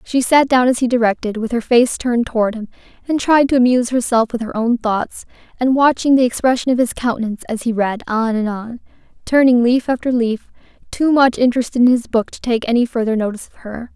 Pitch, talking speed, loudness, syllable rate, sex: 240 Hz, 220 wpm, -16 LUFS, 6.0 syllables/s, female